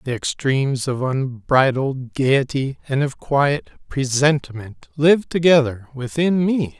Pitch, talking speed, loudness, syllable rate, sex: 140 Hz, 115 wpm, -19 LUFS, 3.8 syllables/s, male